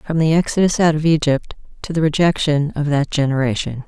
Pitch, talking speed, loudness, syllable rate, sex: 150 Hz, 185 wpm, -17 LUFS, 5.6 syllables/s, female